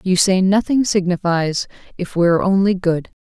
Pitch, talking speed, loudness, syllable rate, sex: 185 Hz, 165 wpm, -17 LUFS, 5.1 syllables/s, female